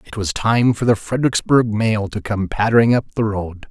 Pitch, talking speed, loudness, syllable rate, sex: 110 Hz, 210 wpm, -18 LUFS, 5.0 syllables/s, male